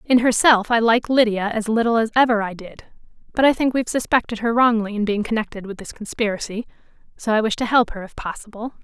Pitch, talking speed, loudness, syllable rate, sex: 225 Hz, 225 wpm, -19 LUFS, 6.1 syllables/s, female